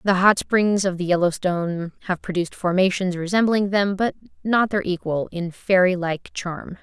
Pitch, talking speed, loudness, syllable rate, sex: 185 Hz, 165 wpm, -21 LUFS, 4.8 syllables/s, female